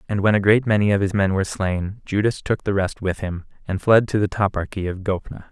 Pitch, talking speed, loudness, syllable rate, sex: 100 Hz, 250 wpm, -21 LUFS, 5.7 syllables/s, male